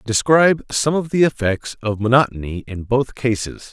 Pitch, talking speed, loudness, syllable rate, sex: 120 Hz, 160 wpm, -18 LUFS, 4.9 syllables/s, male